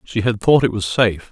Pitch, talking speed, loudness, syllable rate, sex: 105 Hz, 275 wpm, -17 LUFS, 5.8 syllables/s, male